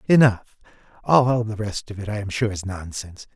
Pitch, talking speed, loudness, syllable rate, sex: 105 Hz, 195 wpm, -22 LUFS, 5.3 syllables/s, male